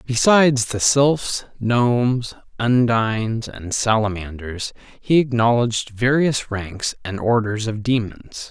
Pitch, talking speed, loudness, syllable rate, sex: 115 Hz, 105 wpm, -19 LUFS, 3.8 syllables/s, male